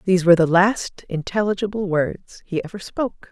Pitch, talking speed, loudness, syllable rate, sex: 185 Hz, 165 wpm, -20 LUFS, 5.5 syllables/s, female